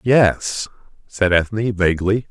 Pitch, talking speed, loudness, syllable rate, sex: 100 Hz, 105 wpm, -18 LUFS, 3.9 syllables/s, male